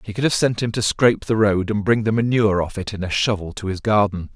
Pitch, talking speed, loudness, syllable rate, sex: 105 Hz, 290 wpm, -20 LUFS, 6.1 syllables/s, male